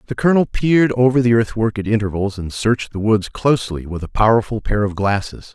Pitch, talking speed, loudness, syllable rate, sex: 110 Hz, 205 wpm, -18 LUFS, 6.0 syllables/s, male